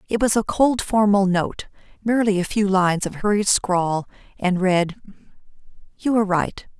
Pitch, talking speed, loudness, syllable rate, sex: 200 Hz, 160 wpm, -20 LUFS, 4.9 syllables/s, female